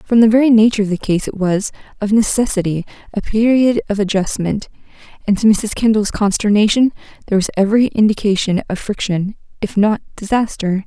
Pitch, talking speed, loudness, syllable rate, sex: 210 Hz, 160 wpm, -16 LUFS, 5.9 syllables/s, female